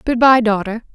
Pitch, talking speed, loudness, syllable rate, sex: 230 Hz, 190 wpm, -14 LUFS, 5.1 syllables/s, female